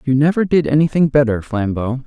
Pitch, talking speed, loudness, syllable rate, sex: 140 Hz, 175 wpm, -16 LUFS, 5.6 syllables/s, male